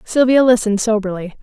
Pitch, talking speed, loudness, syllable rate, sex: 225 Hz, 125 wpm, -15 LUFS, 6.2 syllables/s, female